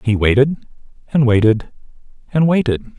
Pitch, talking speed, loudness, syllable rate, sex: 130 Hz, 120 wpm, -16 LUFS, 5.6 syllables/s, male